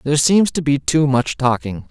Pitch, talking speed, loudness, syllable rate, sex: 140 Hz, 220 wpm, -17 LUFS, 5.0 syllables/s, male